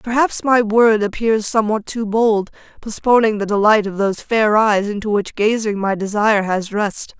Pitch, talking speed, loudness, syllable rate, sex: 215 Hz, 175 wpm, -17 LUFS, 4.9 syllables/s, female